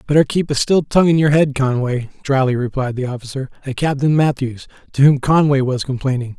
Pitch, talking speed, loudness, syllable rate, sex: 135 Hz, 195 wpm, -17 LUFS, 5.8 syllables/s, male